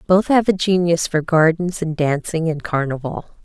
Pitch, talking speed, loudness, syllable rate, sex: 165 Hz, 175 wpm, -18 LUFS, 4.7 syllables/s, female